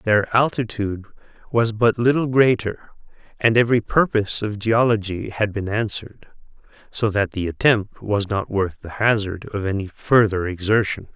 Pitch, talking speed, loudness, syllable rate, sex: 105 Hz, 145 wpm, -20 LUFS, 4.8 syllables/s, male